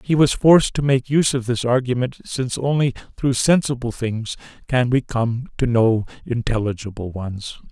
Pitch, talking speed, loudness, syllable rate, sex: 125 Hz, 165 wpm, -20 LUFS, 5.0 syllables/s, male